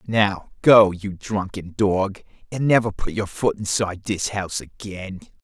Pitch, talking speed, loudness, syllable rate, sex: 100 Hz, 155 wpm, -21 LUFS, 4.2 syllables/s, male